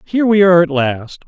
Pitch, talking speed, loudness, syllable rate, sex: 170 Hz, 235 wpm, -13 LUFS, 6.1 syllables/s, male